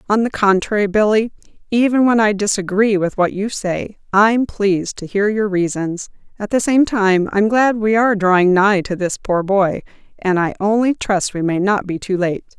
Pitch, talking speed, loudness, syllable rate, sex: 205 Hz, 205 wpm, -16 LUFS, 4.9 syllables/s, female